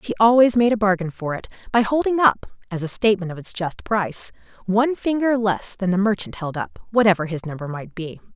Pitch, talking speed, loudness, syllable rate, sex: 200 Hz, 215 wpm, -20 LUFS, 5.9 syllables/s, female